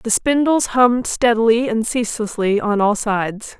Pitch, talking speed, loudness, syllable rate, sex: 225 Hz, 150 wpm, -17 LUFS, 4.8 syllables/s, female